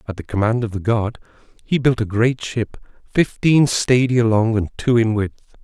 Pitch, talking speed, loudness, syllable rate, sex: 115 Hz, 190 wpm, -19 LUFS, 4.7 syllables/s, male